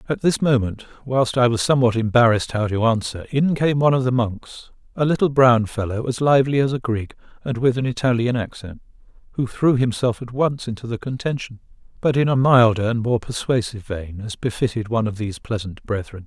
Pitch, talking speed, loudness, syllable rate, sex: 120 Hz, 200 wpm, -20 LUFS, 5.8 syllables/s, male